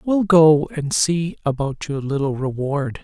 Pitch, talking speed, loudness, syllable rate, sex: 150 Hz, 160 wpm, -19 LUFS, 3.9 syllables/s, male